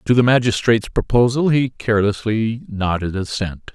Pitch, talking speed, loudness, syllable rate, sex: 110 Hz, 130 wpm, -18 LUFS, 5.0 syllables/s, male